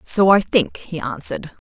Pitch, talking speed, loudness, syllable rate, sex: 170 Hz, 180 wpm, -18 LUFS, 4.7 syllables/s, female